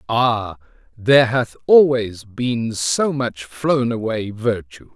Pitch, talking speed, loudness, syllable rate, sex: 115 Hz, 120 wpm, -18 LUFS, 3.3 syllables/s, male